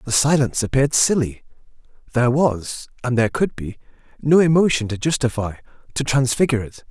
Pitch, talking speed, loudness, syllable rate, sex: 130 Hz, 150 wpm, -19 LUFS, 6.1 syllables/s, male